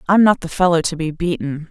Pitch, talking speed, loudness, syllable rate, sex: 170 Hz, 245 wpm, -17 LUFS, 5.8 syllables/s, female